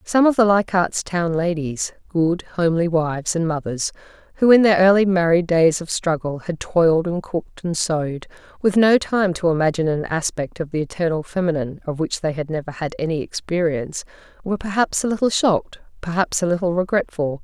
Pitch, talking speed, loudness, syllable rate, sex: 170 Hz, 180 wpm, -20 LUFS, 5.6 syllables/s, female